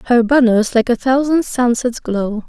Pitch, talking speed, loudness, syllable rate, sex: 240 Hz, 170 wpm, -15 LUFS, 4.4 syllables/s, female